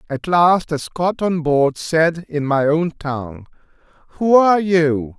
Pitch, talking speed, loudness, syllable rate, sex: 160 Hz, 160 wpm, -17 LUFS, 3.7 syllables/s, male